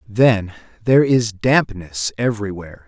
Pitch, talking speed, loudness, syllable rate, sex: 105 Hz, 105 wpm, -18 LUFS, 4.7 syllables/s, male